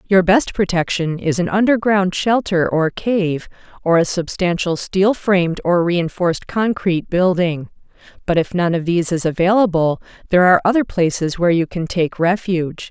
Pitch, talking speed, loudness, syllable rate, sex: 180 Hz, 160 wpm, -17 LUFS, 5.0 syllables/s, female